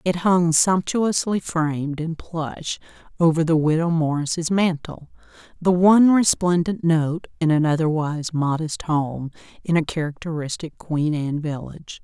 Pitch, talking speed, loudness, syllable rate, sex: 160 Hz, 130 wpm, -21 LUFS, 4.4 syllables/s, female